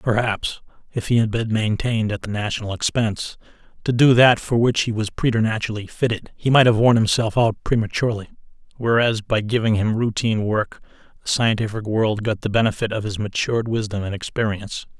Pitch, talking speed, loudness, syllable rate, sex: 110 Hz, 175 wpm, -20 LUFS, 5.8 syllables/s, male